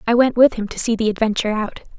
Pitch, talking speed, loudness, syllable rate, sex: 225 Hz, 275 wpm, -18 LUFS, 7.1 syllables/s, female